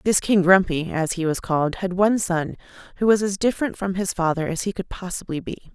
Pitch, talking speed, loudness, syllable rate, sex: 185 Hz, 230 wpm, -22 LUFS, 6.0 syllables/s, female